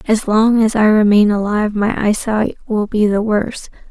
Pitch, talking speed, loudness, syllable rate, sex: 215 Hz, 185 wpm, -15 LUFS, 4.9 syllables/s, female